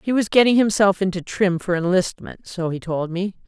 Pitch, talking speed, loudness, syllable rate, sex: 190 Hz, 205 wpm, -20 LUFS, 5.3 syllables/s, female